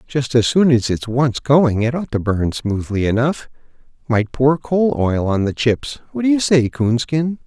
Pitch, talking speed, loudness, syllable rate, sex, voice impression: 130 Hz, 195 wpm, -17 LUFS, 4.3 syllables/s, male, masculine, adult-like, slightly old, slightly thick, relaxed, weak, slightly dark, very soft, muffled, slightly fluent, slightly raspy, slightly cool, intellectual, refreshing, very sincere, very calm, very mature, very friendly, very reassuring, unique, slightly elegant, wild, sweet, very kind, modest, slightly light